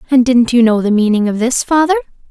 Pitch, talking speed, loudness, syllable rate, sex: 240 Hz, 235 wpm, -12 LUFS, 6.3 syllables/s, female